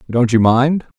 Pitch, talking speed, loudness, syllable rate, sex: 125 Hz, 180 wpm, -14 LUFS, 4.3 syllables/s, male